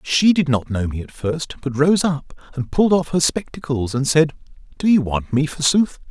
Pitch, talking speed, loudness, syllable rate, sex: 145 Hz, 215 wpm, -19 LUFS, 5.0 syllables/s, male